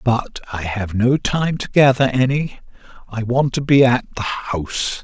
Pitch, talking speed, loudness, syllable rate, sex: 125 Hz, 180 wpm, -18 LUFS, 4.1 syllables/s, male